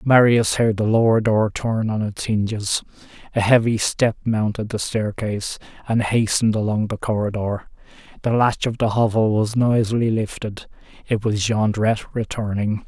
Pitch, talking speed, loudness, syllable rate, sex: 110 Hz, 150 wpm, -20 LUFS, 4.8 syllables/s, male